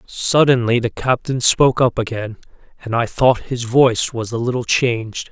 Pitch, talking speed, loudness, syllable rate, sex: 120 Hz, 170 wpm, -17 LUFS, 4.9 syllables/s, male